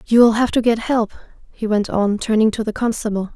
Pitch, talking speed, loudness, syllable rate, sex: 220 Hz, 215 wpm, -18 LUFS, 5.0 syllables/s, female